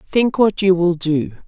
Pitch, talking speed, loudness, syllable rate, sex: 185 Hz, 205 wpm, -17 LUFS, 4.0 syllables/s, female